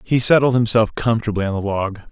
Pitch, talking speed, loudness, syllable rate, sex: 110 Hz, 200 wpm, -18 LUFS, 6.2 syllables/s, male